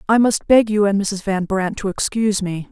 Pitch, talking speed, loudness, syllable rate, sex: 205 Hz, 245 wpm, -18 LUFS, 5.1 syllables/s, female